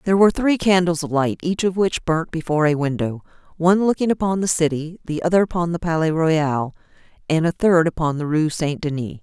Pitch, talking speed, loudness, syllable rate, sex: 165 Hz, 200 wpm, -20 LUFS, 5.9 syllables/s, female